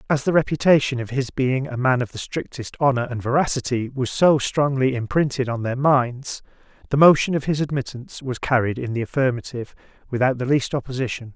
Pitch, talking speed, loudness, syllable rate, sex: 130 Hz, 185 wpm, -21 LUFS, 5.8 syllables/s, male